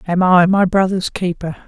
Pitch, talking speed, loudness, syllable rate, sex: 185 Hz, 180 wpm, -15 LUFS, 4.9 syllables/s, female